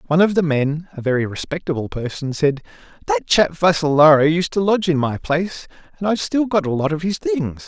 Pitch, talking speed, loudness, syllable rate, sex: 160 Hz, 195 wpm, -18 LUFS, 5.9 syllables/s, male